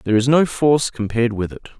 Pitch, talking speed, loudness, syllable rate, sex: 120 Hz, 235 wpm, -18 LUFS, 6.9 syllables/s, male